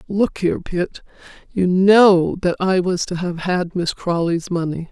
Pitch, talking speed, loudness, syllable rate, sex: 180 Hz, 160 wpm, -18 LUFS, 4.1 syllables/s, female